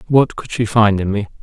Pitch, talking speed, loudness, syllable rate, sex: 110 Hz, 255 wpm, -16 LUFS, 5.4 syllables/s, male